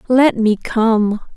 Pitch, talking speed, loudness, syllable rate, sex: 225 Hz, 130 wpm, -15 LUFS, 3.0 syllables/s, female